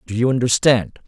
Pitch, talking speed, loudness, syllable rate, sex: 120 Hz, 170 wpm, -17 LUFS, 5.6 syllables/s, male